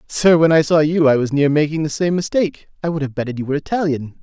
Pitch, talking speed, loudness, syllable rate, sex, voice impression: 155 Hz, 270 wpm, -17 LUFS, 6.6 syllables/s, male, masculine, adult-like, slightly tensed, slightly powerful, bright, soft, slightly muffled, intellectual, calm, slightly friendly, wild, lively